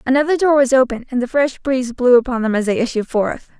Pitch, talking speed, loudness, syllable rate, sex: 255 Hz, 250 wpm, -16 LUFS, 6.5 syllables/s, female